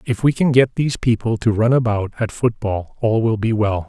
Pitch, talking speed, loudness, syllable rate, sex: 115 Hz, 230 wpm, -18 LUFS, 5.1 syllables/s, male